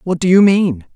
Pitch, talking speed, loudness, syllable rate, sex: 180 Hz, 250 wpm, -13 LUFS, 5.0 syllables/s, female